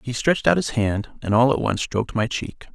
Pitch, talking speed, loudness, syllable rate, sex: 115 Hz, 260 wpm, -21 LUFS, 5.6 syllables/s, male